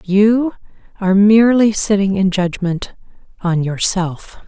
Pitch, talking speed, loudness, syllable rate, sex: 195 Hz, 105 wpm, -15 LUFS, 4.1 syllables/s, female